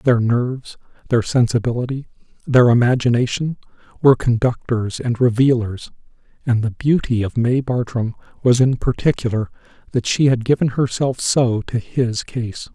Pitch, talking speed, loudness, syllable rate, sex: 125 Hz, 130 wpm, -18 LUFS, 4.8 syllables/s, male